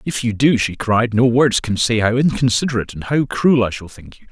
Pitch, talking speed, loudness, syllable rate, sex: 120 Hz, 250 wpm, -17 LUFS, 5.5 syllables/s, male